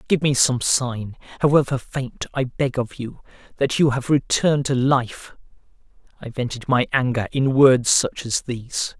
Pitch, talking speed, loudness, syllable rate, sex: 130 Hz, 165 wpm, -20 LUFS, 4.4 syllables/s, male